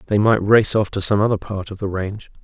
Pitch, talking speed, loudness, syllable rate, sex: 100 Hz, 270 wpm, -18 LUFS, 6.1 syllables/s, male